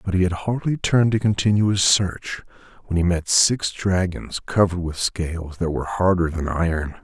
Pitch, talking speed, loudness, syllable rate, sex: 90 Hz, 190 wpm, -21 LUFS, 5.2 syllables/s, male